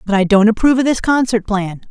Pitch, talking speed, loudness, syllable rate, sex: 220 Hz, 250 wpm, -14 LUFS, 6.3 syllables/s, female